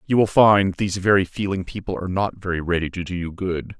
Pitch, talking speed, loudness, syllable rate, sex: 95 Hz, 235 wpm, -21 LUFS, 6.0 syllables/s, male